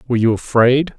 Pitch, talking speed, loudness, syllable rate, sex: 125 Hz, 180 wpm, -15 LUFS, 6.0 syllables/s, male